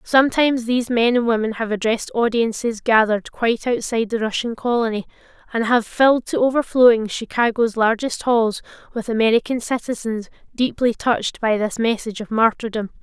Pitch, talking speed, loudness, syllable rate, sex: 230 Hz, 145 wpm, -19 LUFS, 5.7 syllables/s, female